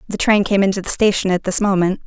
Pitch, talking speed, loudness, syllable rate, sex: 195 Hz, 260 wpm, -16 LUFS, 6.5 syllables/s, female